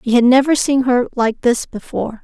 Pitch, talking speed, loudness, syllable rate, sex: 250 Hz, 215 wpm, -15 LUFS, 5.3 syllables/s, female